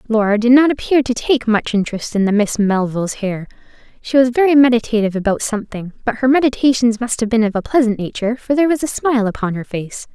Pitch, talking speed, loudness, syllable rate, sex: 230 Hz, 220 wpm, -16 LUFS, 6.5 syllables/s, female